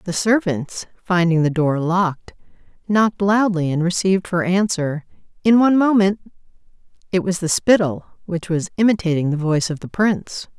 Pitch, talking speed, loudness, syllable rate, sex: 180 Hz, 155 wpm, -18 LUFS, 5.2 syllables/s, female